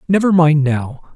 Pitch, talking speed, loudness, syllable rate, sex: 155 Hz, 155 wpm, -14 LUFS, 4.4 syllables/s, male